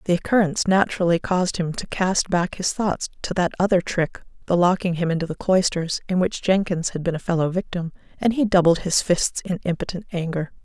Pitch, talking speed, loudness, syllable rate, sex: 180 Hz, 195 wpm, -22 LUFS, 5.7 syllables/s, female